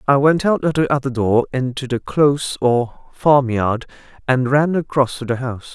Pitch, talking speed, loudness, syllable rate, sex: 135 Hz, 190 wpm, -18 LUFS, 4.8 syllables/s, male